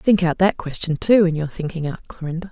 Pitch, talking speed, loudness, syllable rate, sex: 170 Hz, 240 wpm, -20 LUFS, 5.6 syllables/s, female